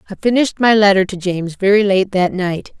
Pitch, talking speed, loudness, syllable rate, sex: 195 Hz, 215 wpm, -15 LUFS, 5.8 syllables/s, female